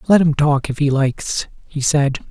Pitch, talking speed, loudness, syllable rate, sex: 145 Hz, 210 wpm, -17 LUFS, 4.8 syllables/s, male